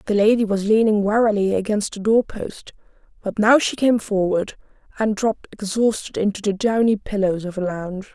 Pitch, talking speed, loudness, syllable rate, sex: 210 Hz, 175 wpm, -20 LUFS, 5.2 syllables/s, female